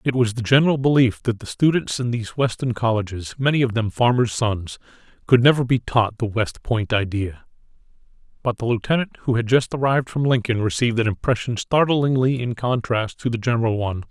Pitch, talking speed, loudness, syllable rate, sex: 120 Hz, 185 wpm, -21 LUFS, 5.7 syllables/s, male